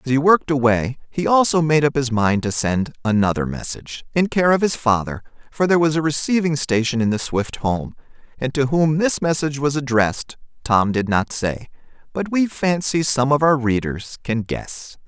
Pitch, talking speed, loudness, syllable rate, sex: 135 Hz, 195 wpm, -19 LUFS, 5.1 syllables/s, male